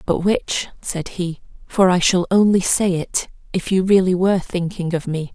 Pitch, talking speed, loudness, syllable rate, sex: 180 Hz, 180 wpm, -19 LUFS, 4.7 syllables/s, female